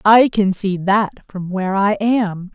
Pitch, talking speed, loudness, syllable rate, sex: 200 Hz, 190 wpm, -17 LUFS, 3.9 syllables/s, female